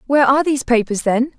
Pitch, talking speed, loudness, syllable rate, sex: 260 Hz, 215 wpm, -16 LUFS, 7.4 syllables/s, female